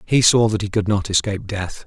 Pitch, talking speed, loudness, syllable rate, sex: 105 Hz, 255 wpm, -19 LUFS, 5.9 syllables/s, male